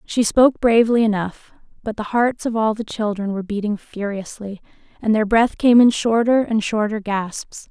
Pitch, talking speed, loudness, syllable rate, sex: 220 Hz, 180 wpm, -19 LUFS, 4.9 syllables/s, female